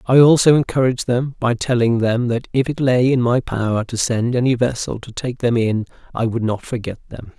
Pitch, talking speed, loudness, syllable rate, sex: 120 Hz, 220 wpm, -18 LUFS, 5.3 syllables/s, male